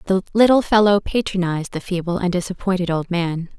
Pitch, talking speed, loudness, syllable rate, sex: 185 Hz, 170 wpm, -19 LUFS, 5.9 syllables/s, female